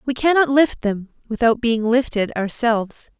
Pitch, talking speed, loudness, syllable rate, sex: 240 Hz, 150 wpm, -19 LUFS, 4.6 syllables/s, female